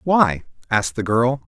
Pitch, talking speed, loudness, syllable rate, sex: 115 Hz, 160 wpm, -19 LUFS, 4.6 syllables/s, male